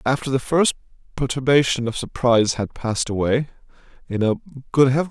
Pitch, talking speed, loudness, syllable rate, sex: 130 Hz, 155 wpm, -21 LUFS, 6.0 syllables/s, male